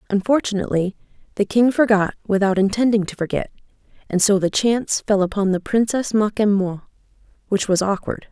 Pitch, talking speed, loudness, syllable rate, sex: 205 Hz, 145 wpm, -19 LUFS, 5.7 syllables/s, female